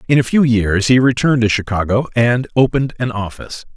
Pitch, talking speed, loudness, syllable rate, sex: 120 Hz, 190 wpm, -15 LUFS, 6.0 syllables/s, male